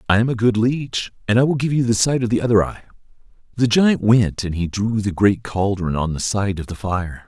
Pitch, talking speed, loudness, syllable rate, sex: 110 Hz, 255 wpm, -19 LUFS, 5.4 syllables/s, male